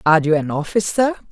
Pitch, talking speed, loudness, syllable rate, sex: 175 Hz, 185 wpm, -18 LUFS, 6.8 syllables/s, female